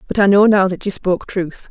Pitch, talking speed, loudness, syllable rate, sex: 195 Hz, 280 wpm, -15 LUFS, 5.8 syllables/s, female